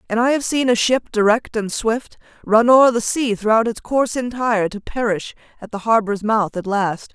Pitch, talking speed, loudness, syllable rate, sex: 225 Hz, 210 wpm, -18 LUFS, 5.1 syllables/s, female